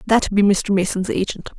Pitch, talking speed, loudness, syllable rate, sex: 200 Hz, 190 wpm, -19 LUFS, 5.0 syllables/s, female